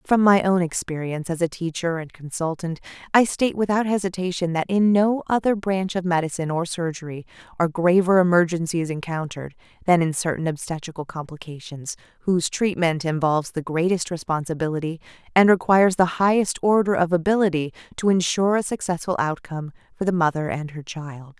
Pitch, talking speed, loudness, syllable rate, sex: 175 Hz, 155 wpm, -22 LUFS, 5.8 syllables/s, female